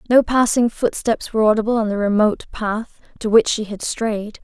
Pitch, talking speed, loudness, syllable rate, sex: 220 Hz, 190 wpm, -19 LUFS, 5.3 syllables/s, female